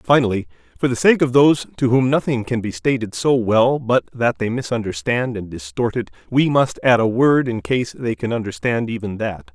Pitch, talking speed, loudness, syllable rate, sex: 120 Hz, 205 wpm, -19 LUFS, 5.1 syllables/s, male